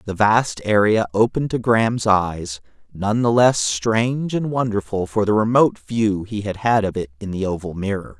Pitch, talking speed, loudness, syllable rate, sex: 105 Hz, 190 wpm, -19 LUFS, 4.9 syllables/s, male